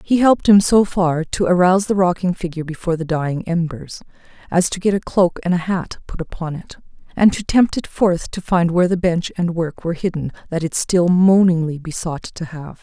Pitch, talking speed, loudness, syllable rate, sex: 175 Hz, 210 wpm, -18 LUFS, 5.4 syllables/s, female